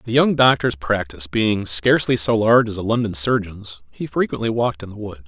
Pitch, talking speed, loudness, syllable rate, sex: 105 Hz, 205 wpm, -18 LUFS, 5.7 syllables/s, male